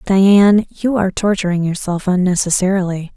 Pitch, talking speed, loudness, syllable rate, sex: 190 Hz, 115 wpm, -15 LUFS, 5.3 syllables/s, female